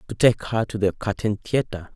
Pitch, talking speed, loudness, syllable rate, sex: 105 Hz, 215 wpm, -23 LUFS, 5.2 syllables/s, male